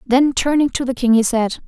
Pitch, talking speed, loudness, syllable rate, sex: 255 Hz, 250 wpm, -17 LUFS, 5.2 syllables/s, female